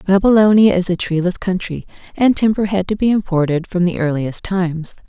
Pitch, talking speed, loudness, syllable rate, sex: 185 Hz, 175 wpm, -16 LUFS, 5.5 syllables/s, female